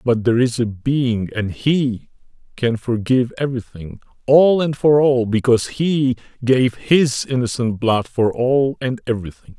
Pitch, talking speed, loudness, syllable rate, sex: 125 Hz, 150 wpm, -18 LUFS, 4.5 syllables/s, male